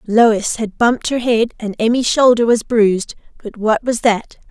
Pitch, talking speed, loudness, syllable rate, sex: 225 Hz, 185 wpm, -15 LUFS, 4.6 syllables/s, female